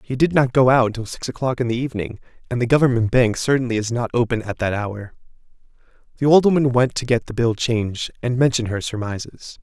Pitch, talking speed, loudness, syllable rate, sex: 120 Hz, 220 wpm, -20 LUFS, 6.2 syllables/s, male